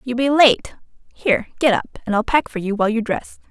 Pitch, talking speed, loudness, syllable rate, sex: 235 Hz, 240 wpm, -18 LUFS, 5.8 syllables/s, female